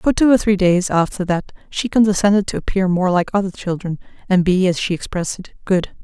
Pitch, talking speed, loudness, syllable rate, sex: 190 Hz, 220 wpm, -18 LUFS, 5.8 syllables/s, female